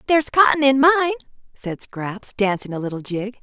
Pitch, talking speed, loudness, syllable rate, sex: 245 Hz, 175 wpm, -19 LUFS, 5.4 syllables/s, female